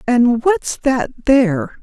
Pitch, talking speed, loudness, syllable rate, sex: 245 Hz, 130 wpm, -16 LUFS, 3.1 syllables/s, female